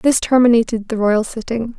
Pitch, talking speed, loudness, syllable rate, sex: 230 Hz, 170 wpm, -16 LUFS, 5.1 syllables/s, female